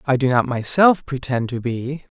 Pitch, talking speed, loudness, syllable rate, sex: 135 Hz, 190 wpm, -19 LUFS, 4.6 syllables/s, male